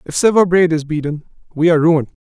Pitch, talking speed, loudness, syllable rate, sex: 160 Hz, 215 wpm, -15 LUFS, 7.1 syllables/s, male